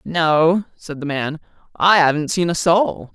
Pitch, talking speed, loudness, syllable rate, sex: 165 Hz, 170 wpm, -17 LUFS, 3.9 syllables/s, male